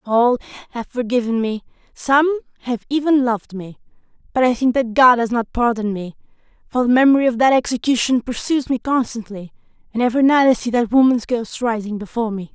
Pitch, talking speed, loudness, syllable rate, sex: 240 Hz, 180 wpm, -18 LUFS, 5.9 syllables/s, female